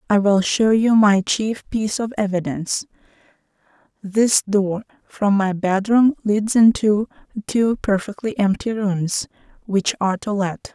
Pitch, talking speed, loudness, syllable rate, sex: 205 Hz, 135 wpm, -19 LUFS, 4.1 syllables/s, female